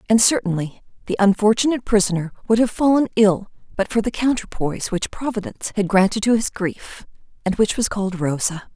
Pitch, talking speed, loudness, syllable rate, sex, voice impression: 205 Hz, 170 wpm, -20 LUFS, 5.8 syllables/s, female, feminine, adult-like, relaxed, slightly bright, soft, raspy, intellectual, calm, friendly, reassuring, elegant, kind, modest